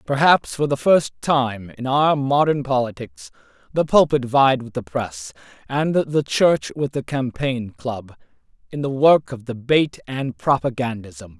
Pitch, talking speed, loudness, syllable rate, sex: 135 Hz, 155 wpm, -20 LUFS, 4.1 syllables/s, male